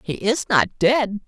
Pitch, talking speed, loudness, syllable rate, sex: 205 Hz, 190 wpm, -19 LUFS, 3.7 syllables/s, male